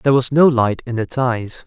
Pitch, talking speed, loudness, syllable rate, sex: 125 Hz, 255 wpm, -17 LUFS, 5.0 syllables/s, male